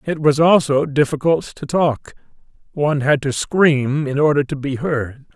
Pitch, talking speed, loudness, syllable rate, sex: 145 Hz, 170 wpm, -17 LUFS, 4.4 syllables/s, male